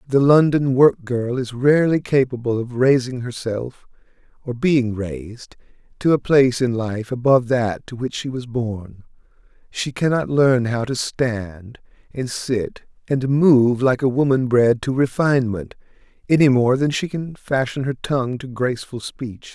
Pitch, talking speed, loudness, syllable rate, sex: 125 Hz, 160 wpm, -19 LUFS, 4.4 syllables/s, male